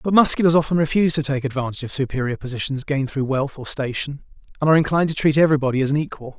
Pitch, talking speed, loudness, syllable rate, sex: 145 Hz, 225 wpm, -20 LUFS, 7.8 syllables/s, male